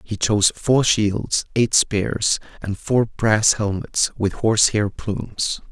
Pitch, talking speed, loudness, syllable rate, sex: 105 Hz, 145 wpm, -19 LUFS, 3.5 syllables/s, male